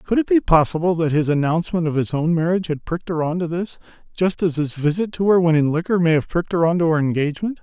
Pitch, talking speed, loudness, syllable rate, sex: 170 Hz, 265 wpm, -19 LUFS, 6.6 syllables/s, male